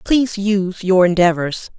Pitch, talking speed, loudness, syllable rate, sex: 190 Hz, 135 wpm, -16 LUFS, 4.9 syllables/s, female